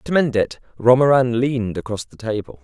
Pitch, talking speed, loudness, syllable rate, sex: 120 Hz, 180 wpm, -19 LUFS, 5.4 syllables/s, male